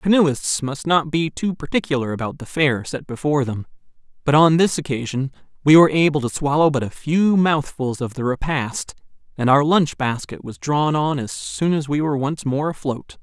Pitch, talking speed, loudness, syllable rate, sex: 145 Hz, 195 wpm, -20 LUFS, 5.1 syllables/s, male